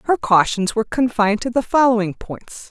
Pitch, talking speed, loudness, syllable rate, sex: 225 Hz, 175 wpm, -18 LUFS, 5.5 syllables/s, female